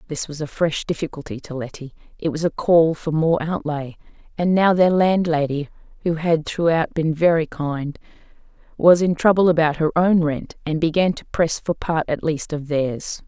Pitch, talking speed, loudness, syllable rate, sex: 160 Hz, 185 wpm, -20 LUFS, 4.8 syllables/s, female